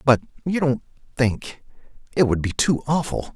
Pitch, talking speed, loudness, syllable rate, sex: 135 Hz, 145 wpm, -22 LUFS, 4.6 syllables/s, male